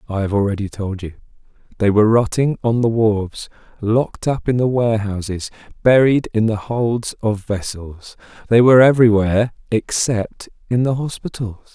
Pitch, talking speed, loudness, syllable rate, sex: 110 Hz, 150 wpm, -17 LUFS, 5.1 syllables/s, male